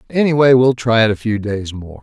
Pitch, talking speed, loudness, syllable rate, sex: 115 Hz, 235 wpm, -15 LUFS, 5.5 syllables/s, male